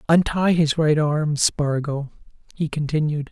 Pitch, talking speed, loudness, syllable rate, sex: 150 Hz, 125 wpm, -21 LUFS, 4.1 syllables/s, male